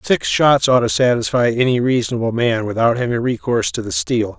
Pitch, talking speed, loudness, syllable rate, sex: 120 Hz, 190 wpm, -17 LUFS, 5.6 syllables/s, male